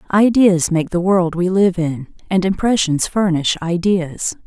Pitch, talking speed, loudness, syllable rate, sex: 185 Hz, 150 wpm, -16 LUFS, 4.1 syllables/s, female